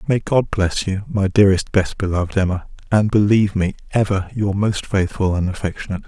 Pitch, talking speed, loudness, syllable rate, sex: 100 Hz, 180 wpm, -19 LUFS, 5.8 syllables/s, male